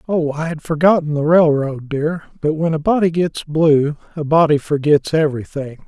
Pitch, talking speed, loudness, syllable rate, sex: 155 Hz, 175 wpm, -17 LUFS, 4.9 syllables/s, male